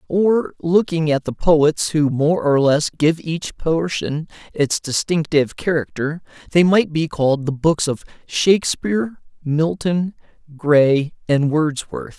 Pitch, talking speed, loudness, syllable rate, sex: 160 Hz, 135 wpm, -18 LUFS, 3.8 syllables/s, male